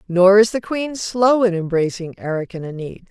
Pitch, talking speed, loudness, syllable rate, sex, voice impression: 195 Hz, 195 wpm, -18 LUFS, 5.1 syllables/s, female, very feminine, very middle-aged, thin, tensed, slightly powerful, slightly bright, slightly soft, clear, fluent, slightly cute, intellectual, refreshing, slightly sincere, calm, friendly, reassuring, very unique, very elegant, slightly wild, very sweet, lively, slightly kind, slightly strict, slightly intense, sharp